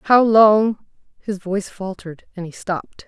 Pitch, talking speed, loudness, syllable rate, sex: 200 Hz, 155 wpm, -18 LUFS, 4.9 syllables/s, female